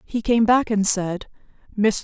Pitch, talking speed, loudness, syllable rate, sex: 215 Hz, 175 wpm, -20 LUFS, 2.5 syllables/s, female